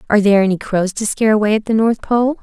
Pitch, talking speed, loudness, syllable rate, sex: 215 Hz, 270 wpm, -15 LUFS, 7.2 syllables/s, female